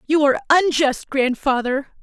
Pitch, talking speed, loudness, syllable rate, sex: 285 Hz, 120 wpm, -18 LUFS, 5.2 syllables/s, female